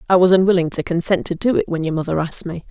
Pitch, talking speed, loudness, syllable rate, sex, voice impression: 175 Hz, 290 wpm, -18 LUFS, 7.2 syllables/s, female, slightly gender-neutral, adult-like, fluent, intellectual, calm